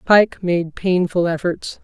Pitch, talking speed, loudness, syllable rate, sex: 175 Hz, 130 wpm, -18 LUFS, 3.6 syllables/s, female